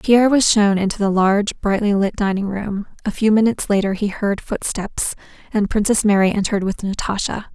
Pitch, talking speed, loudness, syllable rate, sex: 205 Hz, 185 wpm, -18 LUFS, 5.5 syllables/s, female